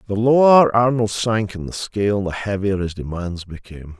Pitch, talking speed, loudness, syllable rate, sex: 105 Hz, 180 wpm, -18 LUFS, 5.0 syllables/s, male